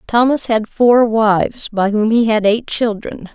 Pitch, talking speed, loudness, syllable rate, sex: 220 Hz, 180 wpm, -14 LUFS, 4.1 syllables/s, female